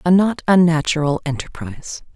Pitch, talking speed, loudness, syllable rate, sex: 165 Hz, 110 wpm, -17 LUFS, 5.3 syllables/s, female